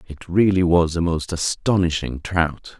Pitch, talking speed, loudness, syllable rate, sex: 85 Hz, 150 wpm, -20 LUFS, 4.2 syllables/s, male